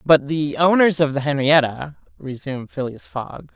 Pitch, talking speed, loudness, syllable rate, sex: 145 Hz, 150 wpm, -19 LUFS, 4.6 syllables/s, female